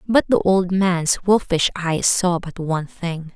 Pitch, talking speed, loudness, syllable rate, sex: 180 Hz, 180 wpm, -19 LUFS, 3.9 syllables/s, female